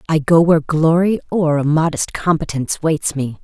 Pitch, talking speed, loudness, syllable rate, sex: 160 Hz, 175 wpm, -16 LUFS, 5.1 syllables/s, female